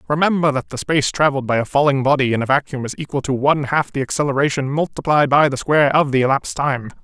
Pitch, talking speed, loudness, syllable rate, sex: 140 Hz, 230 wpm, -18 LUFS, 6.9 syllables/s, male